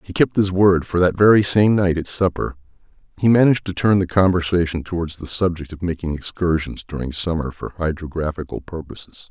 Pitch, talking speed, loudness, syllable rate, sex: 90 Hz, 180 wpm, -19 LUFS, 5.6 syllables/s, male